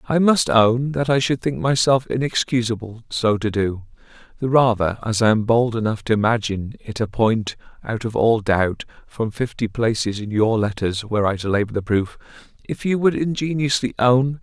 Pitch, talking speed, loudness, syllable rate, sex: 115 Hz, 185 wpm, -20 LUFS, 2.1 syllables/s, male